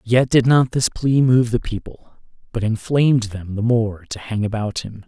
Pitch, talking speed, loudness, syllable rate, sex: 115 Hz, 200 wpm, -19 LUFS, 4.7 syllables/s, male